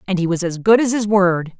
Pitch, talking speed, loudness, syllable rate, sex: 190 Hz, 300 wpm, -16 LUFS, 5.6 syllables/s, female